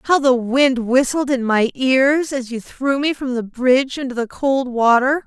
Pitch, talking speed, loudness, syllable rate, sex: 260 Hz, 205 wpm, -17 LUFS, 4.3 syllables/s, female